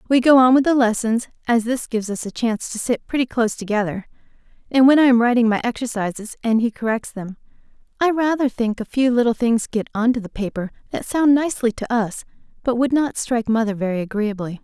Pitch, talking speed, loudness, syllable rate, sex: 235 Hz, 215 wpm, -19 LUFS, 6.1 syllables/s, female